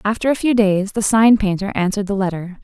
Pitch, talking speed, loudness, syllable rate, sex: 205 Hz, 230 wpm, -17 LUFS, 5.9 syllables/s, female